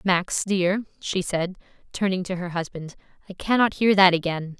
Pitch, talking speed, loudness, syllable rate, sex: 185 Hz, 170 wpm, -23 LUFS, 4.8 syllables/s, female